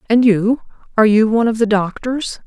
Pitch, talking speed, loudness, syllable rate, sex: 225 Hz, 195 wpm, -16 LUFS, 5.7 syllables/s, female